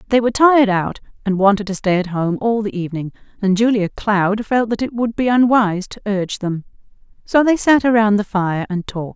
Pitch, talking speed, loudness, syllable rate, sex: 210 Hz, 215 wpm, -17 LUFS, 5.7 syllables/s, female